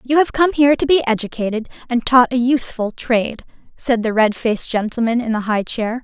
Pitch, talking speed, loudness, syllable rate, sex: 240 Hz, 210 wpm, -17 LUFS, 5.8 syllables/s, female